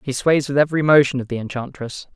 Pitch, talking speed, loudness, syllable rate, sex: 135 Hz, 220 wpm, -18 LUFS, 6.5 syllables/s, male